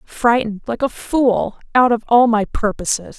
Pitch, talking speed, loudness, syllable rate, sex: 230 Hz, 170 wpm, -17 LUFS, 4.6 syllables/s, female